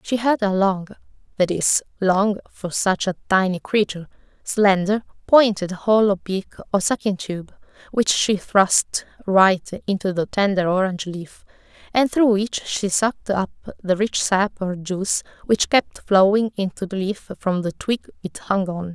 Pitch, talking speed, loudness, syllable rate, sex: 195 Hz, 160 wpm, -20 LUFS, 4.7 syllables/s, female